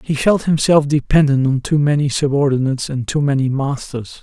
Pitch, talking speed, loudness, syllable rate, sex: 140 Hz, 170 wpm, -16 LUFS, 5.3 syllables/s, male